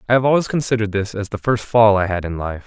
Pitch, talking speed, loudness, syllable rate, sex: 105 Hz, 290 wpm, -18 LUFS, 6.8 syllables/s, male